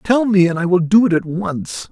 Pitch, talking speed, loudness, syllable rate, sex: 180 Hz, 280 wpm, -16 LUFS, 5.0 syllables/s, male